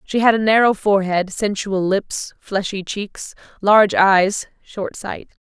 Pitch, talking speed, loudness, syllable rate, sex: 200 Hz, 145 wpm, -18 LUFS, 4.0 syllables/s, female